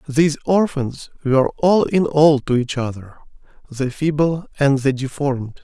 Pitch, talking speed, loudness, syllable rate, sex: 140 Hz, 150 wpm, -18 LUFS, 4.6 syllables/s, male